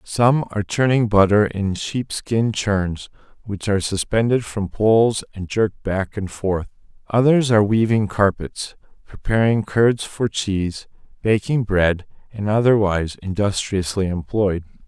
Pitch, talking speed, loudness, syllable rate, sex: 105 Hz, 130 wpm, -20 LUFS, 4.3 syllables/s, male